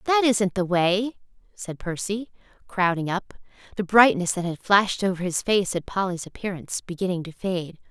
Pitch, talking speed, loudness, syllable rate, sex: 190 Hz, 165 wpm, -24 LUFS, 5.1 syllables/s, female